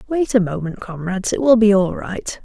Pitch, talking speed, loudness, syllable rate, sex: 210 Hz, 220 wpm, -18 LUFS, 5.3 syllables/s, female